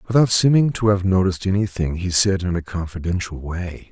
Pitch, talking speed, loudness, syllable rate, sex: 95 Hz, 185 wpm, -20 LUFS, 5.6 syllables/s, male